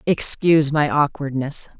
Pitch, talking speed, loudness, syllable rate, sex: 145 Hz, 100 wpm, -19 LUFS, 4.5 syllables/s, female